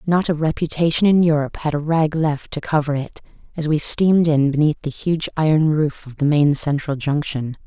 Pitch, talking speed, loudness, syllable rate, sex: 150 Hz, 205 wpm, -19 LUFS, 5.3 syllables/s, female